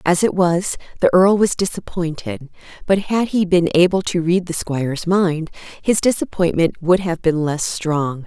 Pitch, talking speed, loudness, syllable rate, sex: 175 Hz, 175 wpm, -18 LUFS, 4.4 syllables/s, female